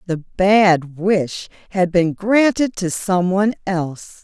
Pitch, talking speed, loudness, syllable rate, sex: 185 Hz, 125 wpm, -18 LUFS, 3.5 syllables/s, female